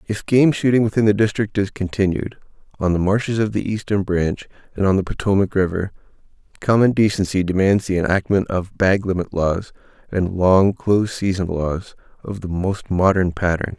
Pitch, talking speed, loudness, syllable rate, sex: 100 Hz, 170 wpm, -19 LUFS, 5.1 syllables/s, male